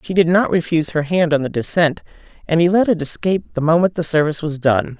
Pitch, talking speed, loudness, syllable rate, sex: 165 Hz, 240 wpm, -17 LUFS, 6.3 syllables/s, female